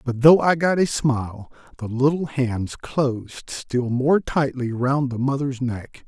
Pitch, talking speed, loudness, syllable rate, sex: 130 Hz, 170 wpm, -21 LUFS, 4.0 syllables/s, male